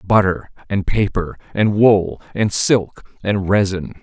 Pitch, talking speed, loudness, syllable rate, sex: 100 Hz, 135 wpm, -18 LUFS, 3.8 syllables/s, male